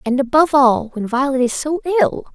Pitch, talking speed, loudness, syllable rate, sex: 275 Hz, 205 wpm, -16 LUFS, 5.6 syllables/s, female